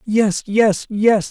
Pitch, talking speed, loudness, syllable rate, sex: 210 Hz, 140 wpm, -17 LUFS, 2.7 syllables/s, male